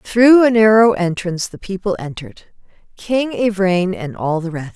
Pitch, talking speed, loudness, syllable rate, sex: 195 Hz, 150 wpm, -16 LUFS, 4.8 syllables/s, female